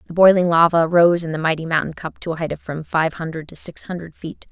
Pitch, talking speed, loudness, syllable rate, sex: 165 Hz, 265 wpm, -19 LUFS, 6.0 syllables/s, female